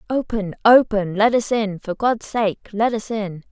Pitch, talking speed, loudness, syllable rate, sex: 215 Hz, 190 wpm, -19 LUFS, 4.2 syllables/s, female